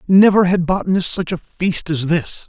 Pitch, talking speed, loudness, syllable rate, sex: 175 Hz, 195 wpm, -16 LUFS, 4.8 syllables/s, male